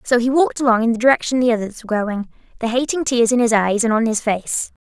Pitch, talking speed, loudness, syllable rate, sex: 235 Hz, 260 wpm, -18 LUFS, 6.5 syllables/s, female